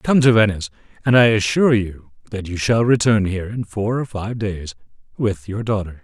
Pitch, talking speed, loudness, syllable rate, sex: 105 Hz, 200 wpm, -18 LUFS, 5.4 syllables/s, male